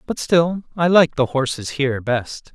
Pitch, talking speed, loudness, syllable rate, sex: 145 Hz, 190 wpm, -19 LUFS, 4.4 syllables/s, male